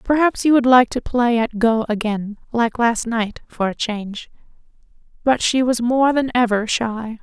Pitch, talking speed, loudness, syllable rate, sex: 235 Hz, 185 wpm, -18 LUFS, 4.4 syllables/s, female